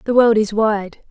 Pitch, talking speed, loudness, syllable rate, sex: 215 Hz, 215 wpm, -16 LUFS, 4.4 syllables/s, female